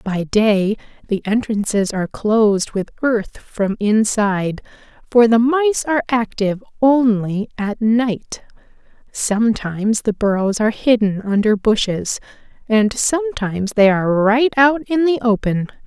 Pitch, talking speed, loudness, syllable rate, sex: 220 Hz, 130 wpm, -17 LUFS, 4.3 syllables/s, female